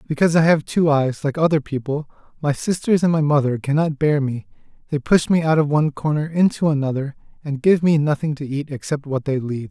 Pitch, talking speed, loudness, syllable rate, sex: 145 Hz, 215 wpm, -19 LUFS, 5.8 syllables/s, male